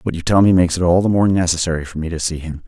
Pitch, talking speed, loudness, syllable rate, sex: 85 Hz, 335 wpm, -16 LUFS, 7.4 syllables/s, male